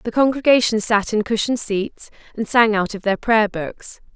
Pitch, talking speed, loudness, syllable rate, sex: 220 Hz, 190 wpm, -18 LUFS, 4.9 syllables/s, female